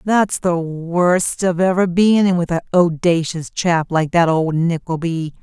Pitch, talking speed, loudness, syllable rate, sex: 170 Hz, 165 wpm, -17 LUFS, 3.9 syllables/s, female